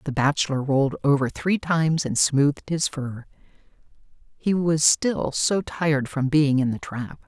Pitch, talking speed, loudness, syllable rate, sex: 145 Hz, 165 wpm, -22 LUFS, 4.5 syllables/s, female